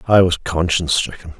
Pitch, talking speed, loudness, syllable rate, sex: 85 Hz, 170 wpm, -17 LUFS, 5.8 syllables/s, male